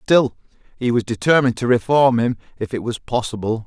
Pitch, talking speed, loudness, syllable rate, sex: 120 Hz, 180 wpm, -19 LUFS, 5.8 syllables/s, male